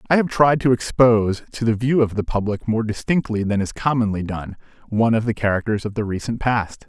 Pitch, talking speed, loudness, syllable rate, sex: 110 Hz, 220 wpm, -20 LUFS, 5.7 syllables/s, male